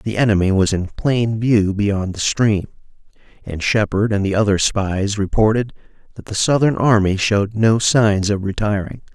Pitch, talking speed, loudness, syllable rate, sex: 105 Hz, 165 wpm, -17 LUFS, 4.6 syllables/s, male